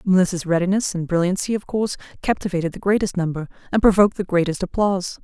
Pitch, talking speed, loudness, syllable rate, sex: 185 Hz, 170 wpm, -21 LUFS, 6.5 syllables/s, female